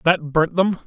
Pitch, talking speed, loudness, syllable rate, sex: 170 Hz, 210 wpm, -19 LUFS, 4.3 syllables/s, male